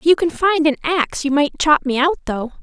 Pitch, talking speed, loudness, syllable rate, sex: 300 Hz, 275 wpm, -17 LUFS, 5.8 syllables/s, female